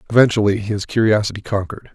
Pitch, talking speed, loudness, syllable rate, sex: 105 Hz, 125 wpm, -18 LUFS, 6.9 syllables/s, male